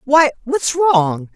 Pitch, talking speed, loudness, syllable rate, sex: 260 Hz, 135 wpm, -16 LUFS, 2.8 syllables/s, female